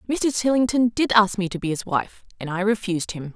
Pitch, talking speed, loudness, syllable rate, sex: 205 Hz, 235 wpm, -22 LUFS, 5.7 syllables/s, female